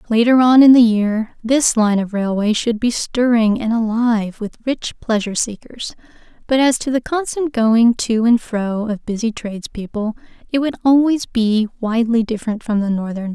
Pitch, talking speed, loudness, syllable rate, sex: 230 Hz, 185 wpm, -17 LUFS, 5.0 syllables/s, female